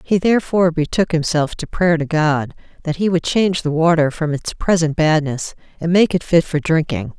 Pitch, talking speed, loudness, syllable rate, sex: 160 Hz, 200 wpm, -17 LUFS, 5.2 syllables/s, female